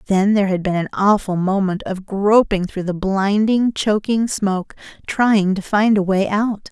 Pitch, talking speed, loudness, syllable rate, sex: 200 Hz, 180 wpm, -18 LUFS, 4.4 syllables/s, female